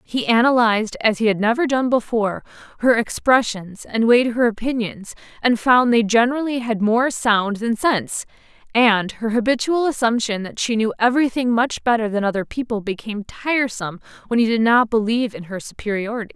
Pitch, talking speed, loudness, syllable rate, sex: 230 Hz, 170 wpm, -19 LUFS, 5.5 syllables/s, female